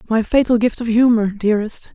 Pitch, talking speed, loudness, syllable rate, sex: 225 Hz, 185 wpm, -16 LUFS, 5.8 syllables/s, female